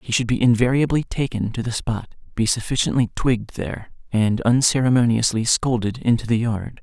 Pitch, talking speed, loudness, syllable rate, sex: 115 Hz, 160 wpm, -20 LUFS, 5.5 syllables/s, male